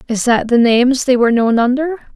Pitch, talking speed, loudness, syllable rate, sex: 250 Hz, 225 wpm, -13 LUFS, 6.0 syllables/s, female